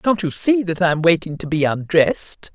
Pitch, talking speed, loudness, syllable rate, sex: 170 Hz, 235 wpm, -18 LUFS, 5.2 syllables/s, male